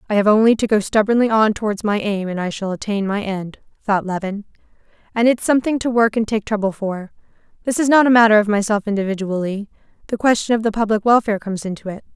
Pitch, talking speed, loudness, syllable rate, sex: 210 Hz, 215 wpm, -18 LUFS, 6.5 syllables/s, female